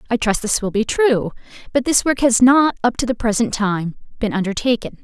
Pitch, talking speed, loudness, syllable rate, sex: 230 Hz, 215 wpm, -18 LUFS, 5.3 syllables/s, female